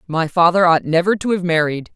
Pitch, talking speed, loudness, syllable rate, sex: 170 Hz, 215 wpm, -16 LUFS, 5.6 syllables/s, female